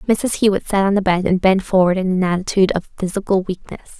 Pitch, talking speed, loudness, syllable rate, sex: 190 Hz, 225 wpm, -17 LUFS, 6.0 syllables/s, female